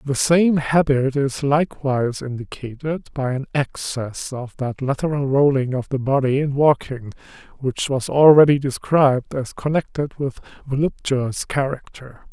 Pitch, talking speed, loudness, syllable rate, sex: 135 Hz, 130 wpm, -20 LUFS, 4.4 syllables/s, male